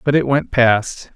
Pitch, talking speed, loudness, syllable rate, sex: 125 Hz, 205 wpm, -16 LUFS, 3.8 syllables/s, male